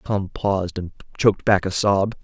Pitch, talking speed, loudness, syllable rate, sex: 100 Hz, 190 wpm, -21 LUFS, 4.9 syllables/s, male